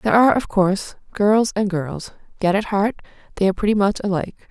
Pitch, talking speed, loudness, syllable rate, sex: 200 Hz, 200 wpm, -19 LUFS, 6.4 syllables/s, female